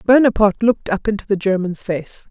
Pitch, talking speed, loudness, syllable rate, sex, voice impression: 205 Hz, 180 wpm, -18 LUFS, 6.2 syllables/s, female, gender-neutral, adult-like, slightly weak, soft, muffled, slightly halting, slightly calm, friendly, unique, kind, modest